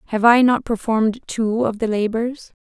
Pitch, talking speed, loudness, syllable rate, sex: 225 Hz, 185 wpm, -19 LUFS, 4.9 syllables/s, female